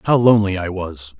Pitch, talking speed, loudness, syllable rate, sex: 100 Hz, 200 wpm, -17 LUFS, 5.8 syllables/s, male